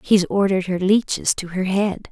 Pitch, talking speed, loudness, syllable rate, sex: 190 Hz, 200 wpm, -20 LUFS, 5.0 syllables/s, female